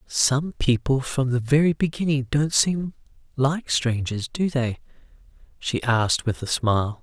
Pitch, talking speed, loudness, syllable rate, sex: 135 Hz, 145 wpm, -23 LUFS, 4.2 syllables/s, male